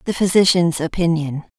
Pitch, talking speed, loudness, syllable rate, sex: 170 Hz, 115 wpm, -17 LUFS, 5.2 syllables/s, female